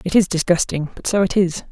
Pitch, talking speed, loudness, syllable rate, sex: 180 Hz, 245 wpm, -19 LUFS, 5.9 syllables/s, female